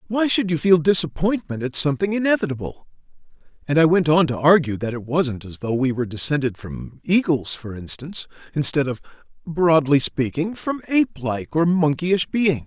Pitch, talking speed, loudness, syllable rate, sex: 155 Hz, 170 wpm, -20 LUFS, 5.2 syllables/s, male